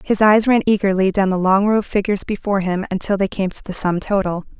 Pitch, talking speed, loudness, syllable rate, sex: 195 Hz, 250 wpm, -18 LUFS, 6.3 syllables/s, female